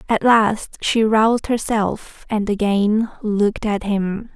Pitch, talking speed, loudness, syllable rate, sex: 215 Hz, 140 wpm, -19 LUFS, 3.5 syllables/s, female